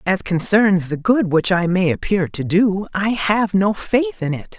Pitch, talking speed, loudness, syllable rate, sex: 190 Hz, 210 wpm, -18 LUFS, 4.2 syllables/s, female